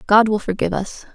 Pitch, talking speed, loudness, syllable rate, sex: 205 Hz, 210 wpm, -19 LUFS, 6.4 syllables/s, female